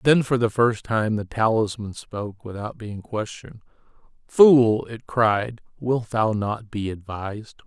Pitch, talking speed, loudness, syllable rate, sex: 110 Hz, 150 wpm, -22 LUFS, 4.1 syllables/s, male